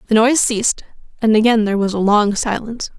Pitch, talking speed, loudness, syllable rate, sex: 220 Hz, 200 wpm, -16 LUFS, 6.8 syllables/s, female